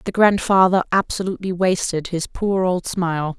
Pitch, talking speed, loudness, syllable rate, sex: 185 Hz, 140 wpm, -19 LUFS, 5.0 syllables/s, female